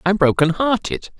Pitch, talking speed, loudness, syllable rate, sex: 185 Hz, 200 wpm, -18 LUFS, 5.7 syllables/s, male